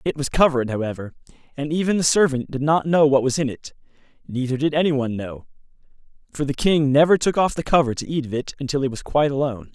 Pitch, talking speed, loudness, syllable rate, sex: 140 Hz, 220 wpm, -21 LUFS, 6.5 syllables/s, male